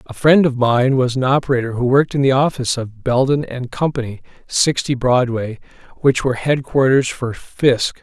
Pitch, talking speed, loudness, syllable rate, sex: 130 Hz, 170 wpm, -17 LUFS, 5.1 syllables/s, male